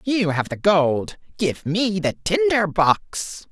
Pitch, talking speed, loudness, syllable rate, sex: 185 Hz, 155 wpm, -21 LUFS, 3.2 syllables/s, male